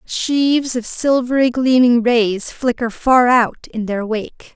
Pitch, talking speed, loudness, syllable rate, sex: 245 Hz, 145 wpm, -16 LUFS, 3.6 syllables/s, female